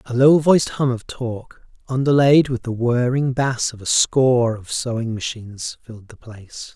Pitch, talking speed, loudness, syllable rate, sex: 125 Hz, 180 wpm, -19 LUFS, 4.7 syllables/s, male